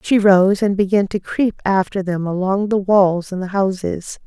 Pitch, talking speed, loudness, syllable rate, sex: 195 Hz, 195 wpm, -17 LUFS, 4.4 syllables/s, female